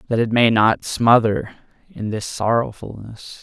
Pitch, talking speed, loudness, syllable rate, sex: 110 Hz, 140 wpm, -18 LUFS, 4.2 syllables/s, male